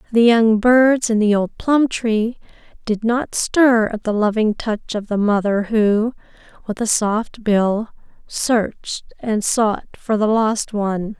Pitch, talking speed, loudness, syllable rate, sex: 220 Hz, 160 wpm, -18 LUFS, 3.7 syllables/s, female